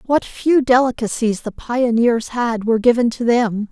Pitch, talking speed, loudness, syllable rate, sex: 235 Hz, 160 wpm, -17 LUFS, 4.5 syllables/s, female